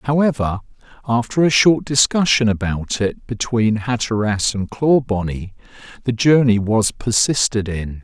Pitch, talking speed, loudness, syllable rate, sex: 115 Hz, 120 wpm, -17 LUFS, 4.3 syllables/s, male